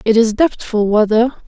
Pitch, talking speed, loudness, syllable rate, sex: 225 Hz, 160 wpm, -14 LUFS, 4.7 syllables/s, female